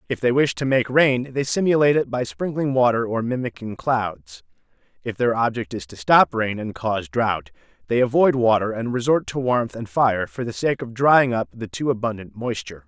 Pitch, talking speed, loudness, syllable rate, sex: 120 Hz, 205 wpm, -21 LUFS, 5.1 syllables/s, male